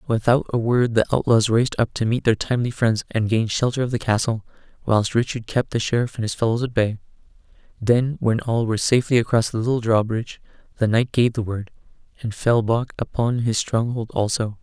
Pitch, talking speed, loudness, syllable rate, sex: 115 Hz, 205 wpm, -21 LUFS, 5.9 syllables/s, male